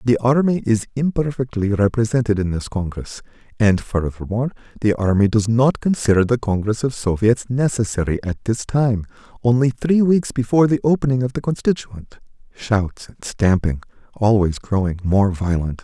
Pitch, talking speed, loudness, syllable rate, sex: 115 Hz, 150 wpm, -19 LUFS, 5.1 syllables/s, male